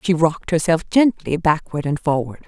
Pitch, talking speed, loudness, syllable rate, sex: 165 Hz, 170 wpm, -19 LUFS, 5.1 syllables/s, female